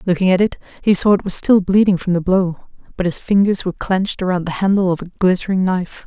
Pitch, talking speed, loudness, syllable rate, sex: 185 Hz, 240 wpm, -17 LUFS, 6.3 syllables/s, female